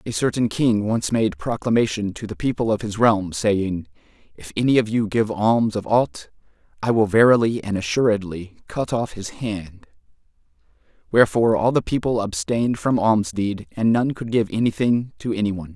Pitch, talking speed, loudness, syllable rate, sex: 110 Hz, 175 wpm, -21 LUFS, 5.1 syllables/s, male